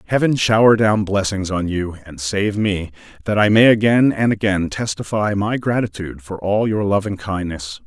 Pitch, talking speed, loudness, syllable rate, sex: 100 Hz, 185 wpm, -18 LUFS, 4.9 syllables/s, male